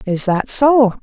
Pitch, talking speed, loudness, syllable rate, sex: 230 Hz, 175 wpm, -14 LUFS, 3.4 syllables/s, female